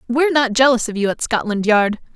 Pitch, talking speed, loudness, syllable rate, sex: 235 Hz, 225 wpm, -17 LUFS, 5.9 syllables/s, female